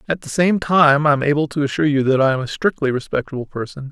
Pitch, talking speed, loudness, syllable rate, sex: 145 Hz, 260 wpm, -18 LUFS, 6.7 syllables/s, male